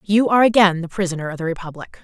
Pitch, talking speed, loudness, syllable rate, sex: 185 Hz, 235 wpm, -18 LUFS, 7.4 syllables/s, female